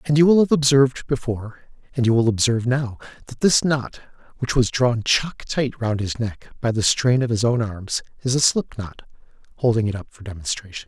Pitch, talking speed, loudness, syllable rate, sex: 120 Hz, 210 wpm, -20 LUFS, 5.3 syllables/s, male